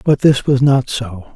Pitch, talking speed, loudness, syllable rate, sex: 130 Hz, 220 wpm, -14 LUFS, 4.2 syllables/s, male